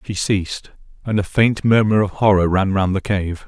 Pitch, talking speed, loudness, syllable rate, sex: 100 Hz, 205 wpm, -18 LUFS, 5.0 syllables/s, male